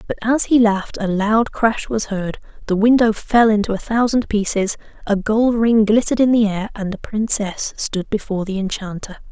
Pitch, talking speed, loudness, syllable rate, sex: 215 Hz, 195 wpm, -18 LUFS, 5.0 syllables/s, female